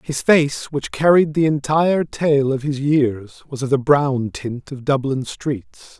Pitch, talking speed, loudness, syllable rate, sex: 140 Hz, 180 wpm, -19 LUFS, 3.8 syllables/s, male